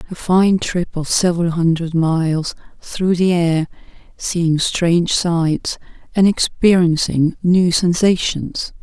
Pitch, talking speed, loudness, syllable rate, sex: 170 Hz, 115 wpm, -16 LUFS, 3.7 syllables/s, female